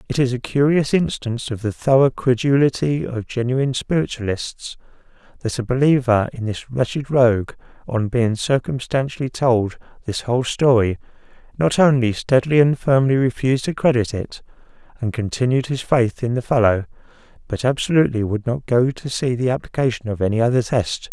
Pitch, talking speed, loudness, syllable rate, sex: 125 Hz, 155 wpm, -19 LUFS, 5.4 syllables/s, male